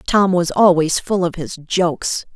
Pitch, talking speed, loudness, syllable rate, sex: 175 Hz, 180 wpm, -17 LUFS, 4.2 syllables/s, female